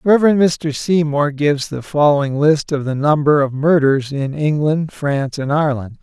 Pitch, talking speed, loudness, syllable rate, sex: 145 Hz, 170 wpm, -16 LUFS, 4.9 syllables/s, male